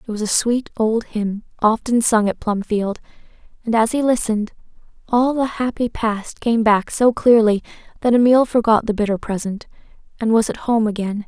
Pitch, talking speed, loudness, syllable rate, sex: 225 Hz, 175 wpm, -18 LUFS, 4.9 syllables/s, female